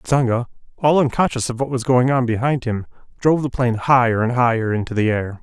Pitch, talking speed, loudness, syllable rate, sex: 125 Hz, 210 wpm, -19 LUFS, 6.2 syllables/s, male